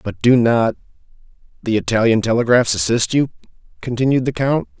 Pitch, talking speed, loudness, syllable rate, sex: 115 Hz, 140 wpm, -17 LUFS, 5.6 syllables/s, male